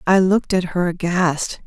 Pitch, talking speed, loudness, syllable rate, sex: 180 Hz, 180 wpm, -19 LUFS, 4.6 syllables/s, female